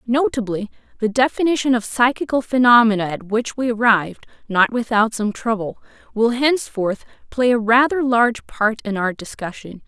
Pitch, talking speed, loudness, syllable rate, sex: 230 Hz, 145 wpm, -18 LUFS, 5.1 syllables/s, female